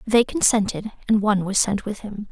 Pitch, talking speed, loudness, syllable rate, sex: 210 Hz, 205 wpm, -21 LUFS, 5.4 syllables/s, female